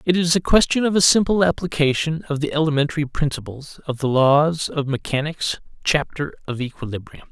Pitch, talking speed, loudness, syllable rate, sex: 150 Hz, 165 wpm, -20 LUFS, 5.5 syllables/s, male